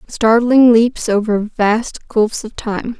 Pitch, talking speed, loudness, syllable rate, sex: 225 Hz, 140 wpm, -15 LUFS, 3.2 syllables/s, female